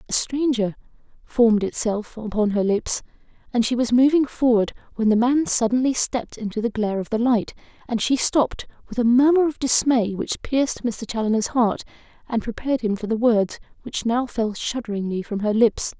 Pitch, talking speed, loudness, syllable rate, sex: 230 Hz, 185 wpm, -21 LUFS, 5.4 syllables/s, female